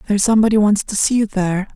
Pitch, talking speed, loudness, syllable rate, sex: 205 Hz, 240 wpm, -16 LUFS, 7.8 syllables/s, male